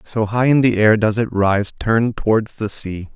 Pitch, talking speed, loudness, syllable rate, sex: 110 Hz, 230 wpm, -17 LUFS, 4.7 syllables/s, male